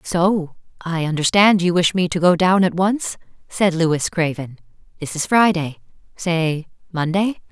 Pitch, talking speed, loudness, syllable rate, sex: 175 Hz, 145 wpm, -18 LUFS, 4.1 syllables/s, female